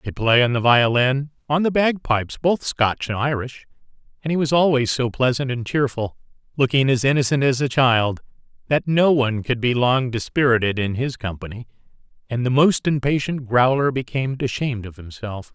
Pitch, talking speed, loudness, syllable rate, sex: 130 Hz, 170 wpm, -20 LUFS, 5.3 syllables/s, male